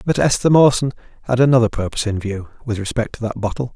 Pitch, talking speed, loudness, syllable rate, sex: 120 Hz, 210 wpm, -18 LUFS, 6.7 syllables/s, male